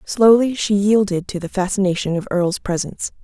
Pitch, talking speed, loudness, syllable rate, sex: 195 Hz, 165 wpm, -18 LUFS, 5.6 syllables/s, female